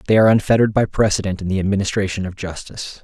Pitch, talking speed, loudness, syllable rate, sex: 100 Hz, 200 wpm, -18 LUFS, 7.7 syllables/s, male